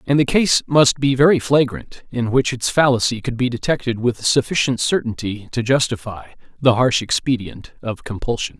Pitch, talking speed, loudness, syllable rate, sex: 125 Hz, 165 wpm, -18 LUFS, 5.0 syllables/s, male